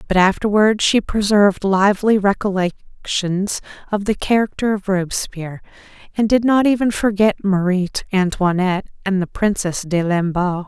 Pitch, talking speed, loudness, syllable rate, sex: 195 Hz, 130 wpm, -18 LUFS, 5.0 syllables/s, female